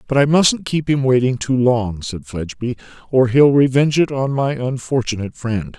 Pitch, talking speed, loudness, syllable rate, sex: 130 Hz, 185 wpm, -17 LUFS, 5.1 syllables/s, male